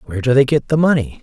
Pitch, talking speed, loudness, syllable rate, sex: 135 Hz, 295 wpm, -15 LUFS, 7.3 syllables/s, male